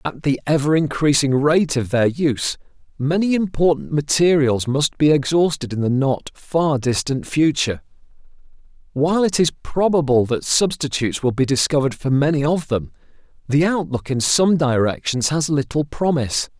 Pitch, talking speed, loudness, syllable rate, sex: 145 Hz, 150 wpm, -19 LUFS, 5.0 syllables/s, male